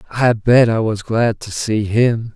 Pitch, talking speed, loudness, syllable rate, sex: 115 Hz, 205 wpm, -16 LUFS, 3.8 syllables/s, male